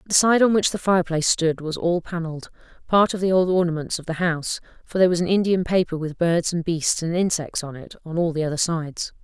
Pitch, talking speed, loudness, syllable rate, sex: 170 Hz, 240 wpm, -22 LUFS, 6.1 syllables/s, female